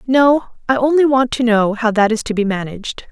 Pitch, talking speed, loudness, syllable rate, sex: 235 Hz, 230 wpm, -15 LUFS, 5.5 syllables/s, female